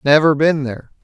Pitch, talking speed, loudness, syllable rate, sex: 145 Hz, 175 wpm, -15 LUFS, 5.9 syllables/s, male